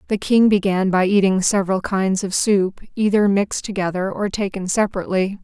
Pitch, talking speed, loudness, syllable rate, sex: 195 Hz, 165 wpm, -19 LUFS, 5.5 syllables/s, female